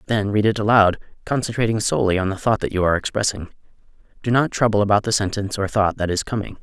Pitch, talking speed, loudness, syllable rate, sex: 105 Hz, 210 wpm, -20 LUFS, 6.9 syllables/s, male